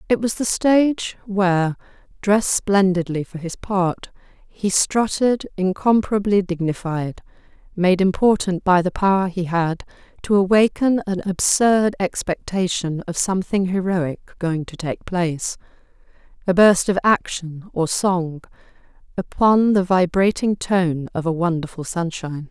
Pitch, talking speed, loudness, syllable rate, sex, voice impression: 185 Hz, 120 wpm, -20 LUFS, 4.3 syllables/s, female, feminine, adult-like, slightly relaxed, clear, intellectual, calm, reassuring, elegant, slightly lively, slightly strict